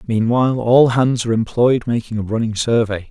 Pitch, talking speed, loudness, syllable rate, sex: 115 Hz, 175 wpm, -16 LUFS, 5.4 syllables/s, male